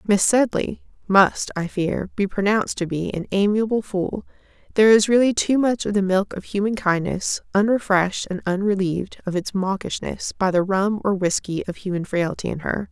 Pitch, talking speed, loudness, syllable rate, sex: 195 Hz, 180 wpm, -21 LUFS, 5.1 syllables/s, female